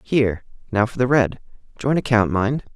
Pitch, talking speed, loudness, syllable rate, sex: 115 Hz, 155 wpm, -20 LUFS, 5.2 syllables/s, male